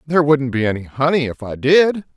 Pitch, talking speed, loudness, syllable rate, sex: 140 Hz, 220 wpm, -17 LUFS, 5.6 syllables/s, male